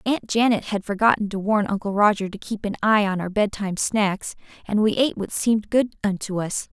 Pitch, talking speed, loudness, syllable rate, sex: 205 Hz, 210 wpm, -22 LUFS, 5.5 syllables/s, female